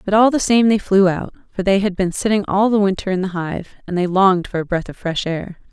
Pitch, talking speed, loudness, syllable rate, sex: 190 Hz, 285 wpm, -18 LUFS, 5.7 syllables/s, female